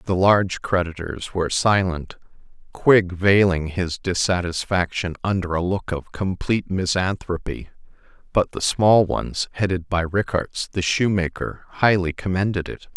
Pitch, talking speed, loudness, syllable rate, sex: 90 Hz, 115 wpm, -21 LUFS, 4.4 syllables/s, male